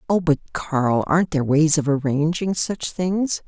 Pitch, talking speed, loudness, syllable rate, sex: 160 Hz, 175 wpm, -20 LUFS, 4.5 syllables/s, female